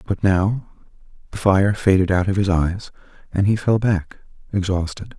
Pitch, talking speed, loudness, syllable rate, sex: 95 Hz, 160 wpm, -20 LUFS, 4.6 syllables/s, male